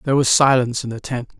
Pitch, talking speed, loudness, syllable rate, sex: 125 Hz, 260 wpm, -18 LUFS, 7.5 syllables/s, male